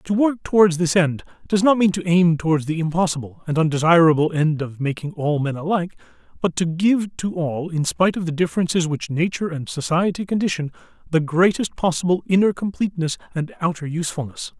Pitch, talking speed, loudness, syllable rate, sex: 170 Hz, 180 wpm, -20 LUFS, 5.9 syllables/s, male